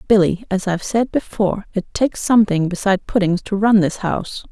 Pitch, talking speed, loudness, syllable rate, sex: 200 Hz, 185 wpm, -18 LUFS, 6.0 syllables/s, female